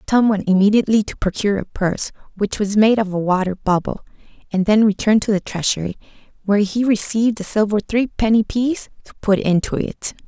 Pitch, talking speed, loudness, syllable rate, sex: 210 Hz, 180 wpm, -18 LUFS, 6.0 syllables/s, female